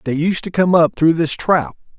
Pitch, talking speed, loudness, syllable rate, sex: 165 Hz, 240 wpm, -16 LUFS, 4.8 syllables/s, male